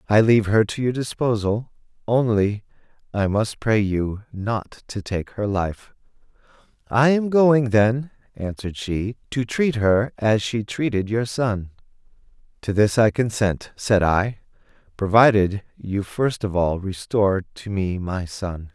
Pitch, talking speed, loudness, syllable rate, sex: 105 Hz, 145 wpm, -21 LUFS, 4.0 syllables/s, male